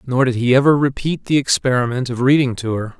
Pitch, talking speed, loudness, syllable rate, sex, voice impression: 130 Hz, 220 wpm, -17 LUFS, 5.9 syllables/s, male, masculine, adult-like, slightly powerful, slightly refreshing, sincere